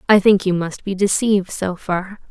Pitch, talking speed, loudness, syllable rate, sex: 190 Hz, 210 wpm, -18 LUFS, 4.9 syllables/s, female